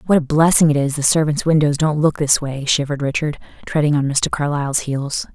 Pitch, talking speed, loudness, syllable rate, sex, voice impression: 145 Hz, 215 wpm, -17 LUFS, 5.8 syllables/s, female, feminine, very adult-like, slightly soft, slightly intellectual, calm, slightly elegant, slightly sweet